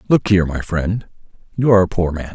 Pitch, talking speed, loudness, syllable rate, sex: 95 Hz, 230 wpm, -17 LUFS, 6.5 syllables/s, male